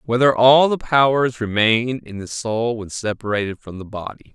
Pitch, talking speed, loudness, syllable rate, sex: 115 Hz, 180 wpm, -18 LUFS, 4.8 syllables/s, male